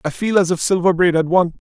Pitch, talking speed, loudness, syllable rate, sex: 175 Hz, 280 wpm, -16 LUFS, 6.1 syllables/s, male